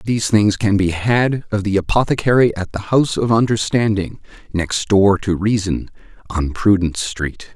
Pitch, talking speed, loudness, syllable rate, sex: 105 Hz, 160 wpm, -17 LUFS, 4.7 syllables/s, male